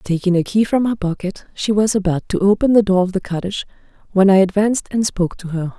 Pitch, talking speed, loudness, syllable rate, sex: 195 Hz, 240 wpm, -17 LUFS, 6.2 syllables/s, female